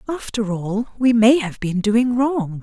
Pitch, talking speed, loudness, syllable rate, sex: 225 Hz, 185 wpm, -19 LUFS, 3.8 syllables/s, female